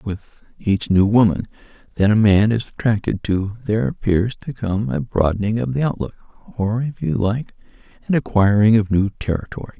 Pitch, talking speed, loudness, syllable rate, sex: 105 Hz, 170 wpm, -19 LUFS, 5.0 syllables/s, male